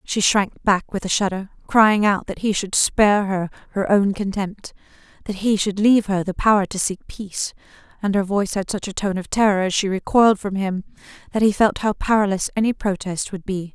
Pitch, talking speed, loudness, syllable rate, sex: 200 Hz, 205 wpm, -20 LUFS, 5.5 syllables/s, female